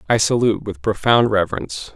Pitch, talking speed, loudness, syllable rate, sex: 110 Hz, 155 wpm, -18 LUFS, 6.2 syllables/s, male